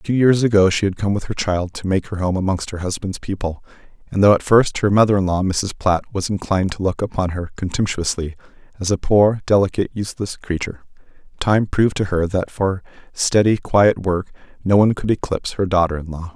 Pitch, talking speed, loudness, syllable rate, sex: 95 Hz, 210 wpm, -19 LUFS, 5.8 syllables/s, male